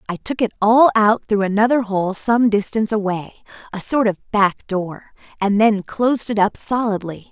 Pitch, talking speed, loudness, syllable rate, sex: 210 Hz, 180 wpm, -18 LUFS, 4.8 syllables/s, female